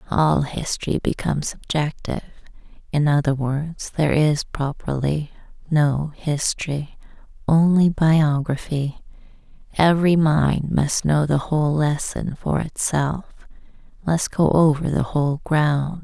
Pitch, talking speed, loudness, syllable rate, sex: 150 Hz, 105 wpm, -21 LUFS, 4.2 syllables/s, female